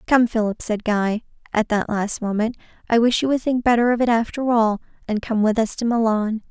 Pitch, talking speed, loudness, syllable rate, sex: 225 Hz, 220 wpm, -20 LUFS, 5.3 syllables/s, female